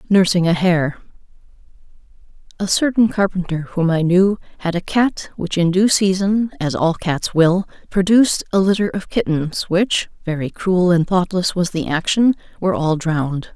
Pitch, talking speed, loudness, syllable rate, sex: 180 Hz, 135 wpm, -18 LUFS, 4.7 syllables/s, female